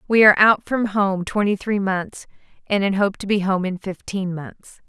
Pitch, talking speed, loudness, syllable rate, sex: 195 Hz, 210 wpm, -20 LUFS, 4.7 syllables/s, female